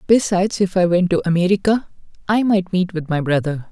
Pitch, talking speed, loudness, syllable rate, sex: 185 Hz, 195 wpm, -18 LUFS, 5.7 syllables/s, male